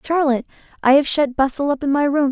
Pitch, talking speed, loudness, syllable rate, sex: 280 Hz, 235 wpm, -18 LUFS, 6.5 syllables/s, female